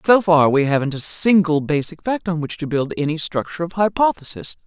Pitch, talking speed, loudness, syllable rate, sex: 165 Hz, 205 wpm, -18 LUFS, 5.7 syllables/s, female